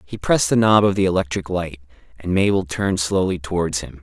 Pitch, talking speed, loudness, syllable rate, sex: 90 Hz, 210 wpm, -19 LUFS, 5.9 syllables/s, male